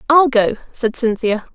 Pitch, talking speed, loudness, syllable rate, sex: 250 Hz, 155 wpm, -17 LUFS, 4.3 syllables/s, female